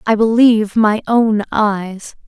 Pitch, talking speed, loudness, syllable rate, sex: 215 Hz, 130 wpm, -14 LUFS, 3.6 syllables/s, female